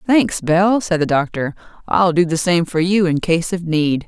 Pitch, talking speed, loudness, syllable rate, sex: 175 Hz, 220 wpm, -17 LUFS, 4.4 syllables/s, female